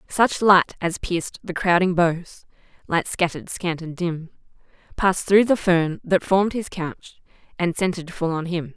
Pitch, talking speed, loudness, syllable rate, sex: 175 Hz, 170 wpm, -21 LUFS, 4.1 syllables/s, female